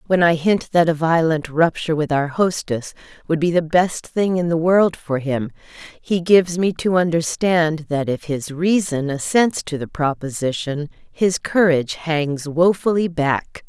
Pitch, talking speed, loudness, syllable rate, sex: 165 Hz, 165 wpm, -19 LUFS, 4.3 syllables/s, female